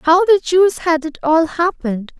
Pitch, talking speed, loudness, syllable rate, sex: 325 Hz, 190 wpm, -15 LUFS, 4.9 syllables/s, female